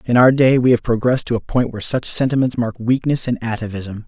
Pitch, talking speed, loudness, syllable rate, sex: 120 Hz, 235 wpm, -17 LUFS, 6.1 syllables/s, male